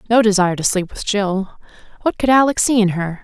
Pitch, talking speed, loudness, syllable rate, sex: 205 Hz, 220 wpm, -17 LUFS, 5.9 syllables/s, female